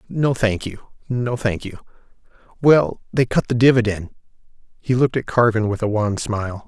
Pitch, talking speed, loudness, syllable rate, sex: 115 Hz, 155 wpm, -19 LUFS, 5.2 syllables/s, male